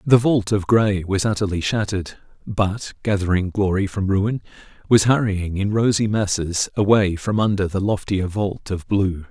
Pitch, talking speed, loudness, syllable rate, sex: 100 Hz, 160 wpm, -20 LUFS, 4.6 syllables/s, male